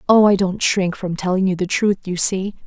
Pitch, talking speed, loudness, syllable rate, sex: 190 Hz, 245 wpm, -18 LUFS, 5.2 syllables/s, female